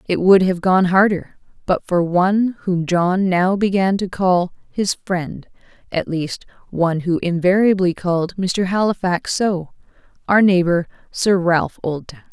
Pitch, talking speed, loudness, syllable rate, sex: 185 Hz, 140 wpm, -18 LUFS, 4.2 syllables/s, female